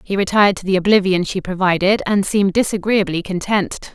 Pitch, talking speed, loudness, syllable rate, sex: 195 Hz, 165 wpm, -17 LUFS, 5.8 syllables/s, female